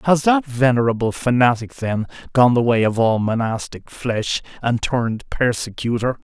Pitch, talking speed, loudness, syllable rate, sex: 120 Hz, 140 wpm, -19 LUFS, 4.6 syllables/s, male